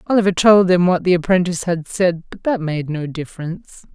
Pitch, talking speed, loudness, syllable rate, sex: 175 Hz, 200 wpm, -17 LUFS, 5.7 syllables/s, female